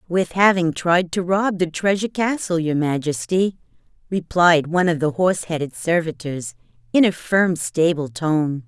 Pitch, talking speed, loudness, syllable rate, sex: 170 Hz, 150 wpm, -20 LUFS, 4.6 syllables/s, female